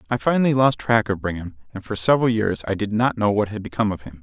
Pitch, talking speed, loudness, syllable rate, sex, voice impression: 105 Hz, 270 wpm, -21 LUFS, 6.8 syllables/s, male, masculine, very adult-like, very middle-aged, very thick, tensed, powerful, slightly hard, clear, fluent, slightly raspy, very cool, intellectual, very refreshing, sincere, very calm, very mature, friendly, reassuring, unique, elegant, very wild, sweet, very lively, kind, slightly intense